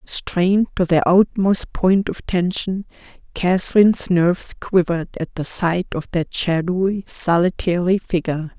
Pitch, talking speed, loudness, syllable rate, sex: 180 Hz, 125 wpm, -19 LUFS, 4.5 syllables/s, female